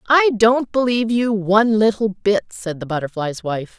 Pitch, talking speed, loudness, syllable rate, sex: 205 Hz, 175 wpm, -18 LUFS, 4.9 syllables/s, female